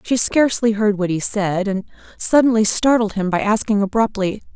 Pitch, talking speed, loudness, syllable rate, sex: 210 Hz, 170 wpm, -18 LUFS, 5.2 syllables/s, female